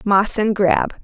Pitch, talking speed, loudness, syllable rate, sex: 205 Hz, 175 wpm, -17 LUFS, 3.5 syllables/s, female